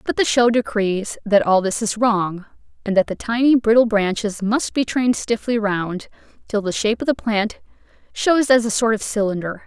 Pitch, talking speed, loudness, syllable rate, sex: 220 Hz, 200 wpm, -19 LUFS, 5.0 syllables/s, female